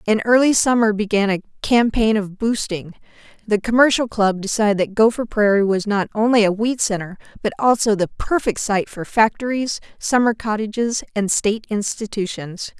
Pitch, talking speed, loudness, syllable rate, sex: 215 Hz, 155 wpm, -19 LUFS, 5.1 syllables/s, female